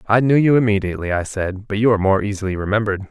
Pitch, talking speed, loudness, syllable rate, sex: 105 Hz, 230 wpm, -18 LUFS, 7.5 syllables/s, male